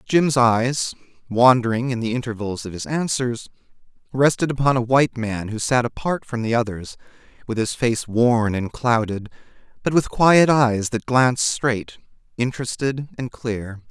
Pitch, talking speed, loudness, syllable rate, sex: 120 Hz, 155 wpm, -20 LUFS, 4.6 syllables/s, male